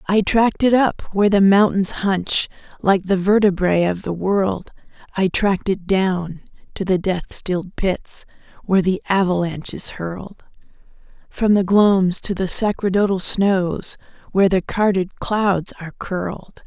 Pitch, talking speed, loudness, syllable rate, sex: 190 Hz, 150 wpm, -19 LUFS, 4.3 syllables/s, female